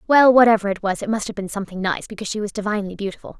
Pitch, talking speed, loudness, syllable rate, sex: 205 Hz, 265 wpm, -20 LUFS, 8.1 syllables/s, female